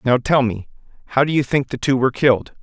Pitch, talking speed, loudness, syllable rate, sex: 130 Hz, 250 wpm, -18 LUFS, 6.5 syllables/s, male